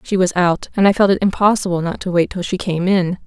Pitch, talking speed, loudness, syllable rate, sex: 185 Hz, 275 wpm, -17 LUFS, 5.9 syllables/s, female